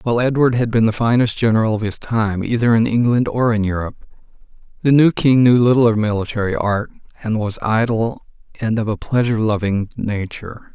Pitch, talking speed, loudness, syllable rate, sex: 115 Hz, 185 wpm, -17 LUFS, 5.8 syllables/s, male